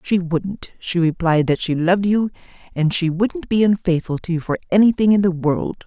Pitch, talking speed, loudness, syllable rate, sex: 180 Hz, 205 wpm, -19 LUFS, 5.1 syllables/s, female